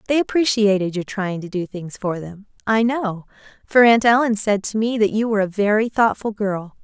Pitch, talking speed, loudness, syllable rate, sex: 210 Hz, 210 wpm, -19 LUFS, 5.1 syllables/s, female